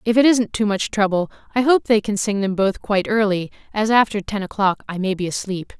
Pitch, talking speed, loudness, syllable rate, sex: 205 Hz, 240 wpm, -20 LUFS, 5.6 syllables/s, female